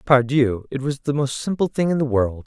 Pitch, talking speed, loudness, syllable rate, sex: 135 Hz, 245 wpm, -21 LUFS, 5.2 syllables/s, male